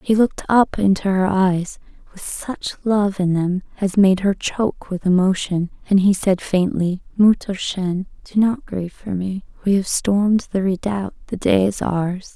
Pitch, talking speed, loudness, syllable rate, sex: 195 Hz, 175 wpm, -19 LUFS, 4.4 syllables/s, female